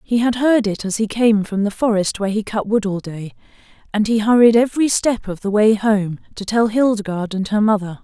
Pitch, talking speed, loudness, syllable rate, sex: 215 Hz, 230 wpm, -17 LUFS, 5.6 syllables/s, female